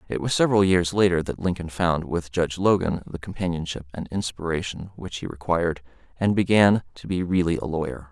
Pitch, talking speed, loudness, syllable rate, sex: 90 Hz, 185 wpm, -24 LUFS, 5.8 syllables/s, male